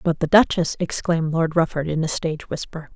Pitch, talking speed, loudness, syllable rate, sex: 165 Hz, 205 wpm, -21 LUFS, 5.7 syllables/s, female